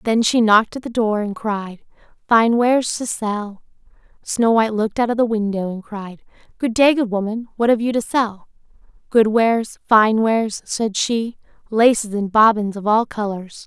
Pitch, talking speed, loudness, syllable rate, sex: 220 Hz, 185 wpm, -18 LUFS, 4.8 syllables/s, female